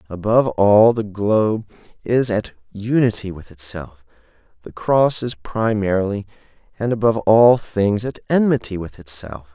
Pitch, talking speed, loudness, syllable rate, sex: 105 Hz, 130 wpm, -18 LUFS, 4.6 syllables/s, male